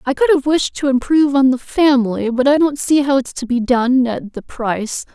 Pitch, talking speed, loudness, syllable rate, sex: 265 Hz, 245 wpm, -16 LUFS, 5.3 syllables/s, female